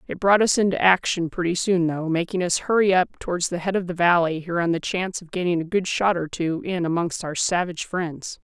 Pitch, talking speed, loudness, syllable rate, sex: 175 Hz, 240 wpm, -22 LUFS, 5.7 syllables/s, female